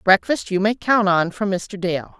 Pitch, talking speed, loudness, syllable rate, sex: 195 Hz, 220 wpm, -20 LUFS, 4.3 syllables/s, female